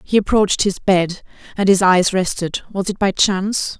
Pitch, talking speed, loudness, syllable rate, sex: 190 Hz, 190 wpm, -17 LUFS, 4.9 syllables/s, female